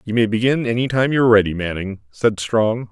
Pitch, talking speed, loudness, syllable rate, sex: 110 Hz, 225 wpm, -18 LUFS, 6.0 syllables/s, male